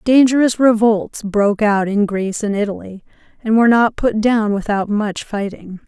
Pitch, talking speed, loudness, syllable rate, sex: 215 Hz, 165 wpm, -16 LUFS, 4.9 syllables/s, female